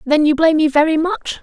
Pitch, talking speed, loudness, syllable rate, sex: 315 Hz, 250 wpm, -15 LUFS, 6.3 syllables/s, female